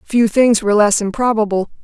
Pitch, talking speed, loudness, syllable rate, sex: 215 Hz, 165 wpm, -14 LUFS, 5.8 syllables/s, female